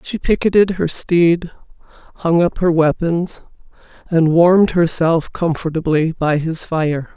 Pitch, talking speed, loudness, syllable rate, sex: 170 Hz, 125 wpm, -16 LUFS, 4.1 syllables/s, female